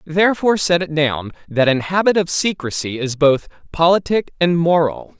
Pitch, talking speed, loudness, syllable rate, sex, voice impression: 165 Hz, 160 wpm, -17 LUFS, 5.0 syllables/s, male, very masculine, very adult-like, thick, very tensed, powerful, very bright, soft, very clear, very fluent, cool, intellectual, very refreshing, sincere, calm, very friendly, very reassuring, unique, slightly elegant, wild, sweet, very lively, slightly kind, slightly intense, light